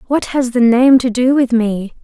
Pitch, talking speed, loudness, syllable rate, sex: 245 Hz, 235 wpm, -13 LUFS, 4.4 syllables/s, female